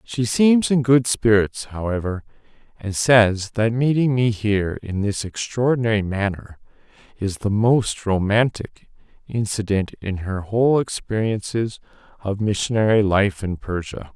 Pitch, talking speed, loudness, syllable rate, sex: 110 Hz, 125 wpm, -20 LUFS, 4.4 syllables/s, male